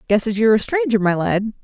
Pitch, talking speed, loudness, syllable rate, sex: 215 Hz, 255 wpm, -18 LUFS, 6.5 syllables/s, female